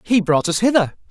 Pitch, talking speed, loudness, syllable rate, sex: 195 Hz, 215 wpm, -17 LUFS, 5.6 syllables/s, male